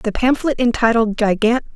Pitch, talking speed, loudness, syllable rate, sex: 235 Hz, 135 wpm, -17 LUFS, 5.1 syllables/s, female